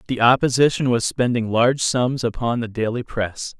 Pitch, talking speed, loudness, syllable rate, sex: 120 Hz, 165 wpm, -20 LUFS, 5.0 syllables/s, male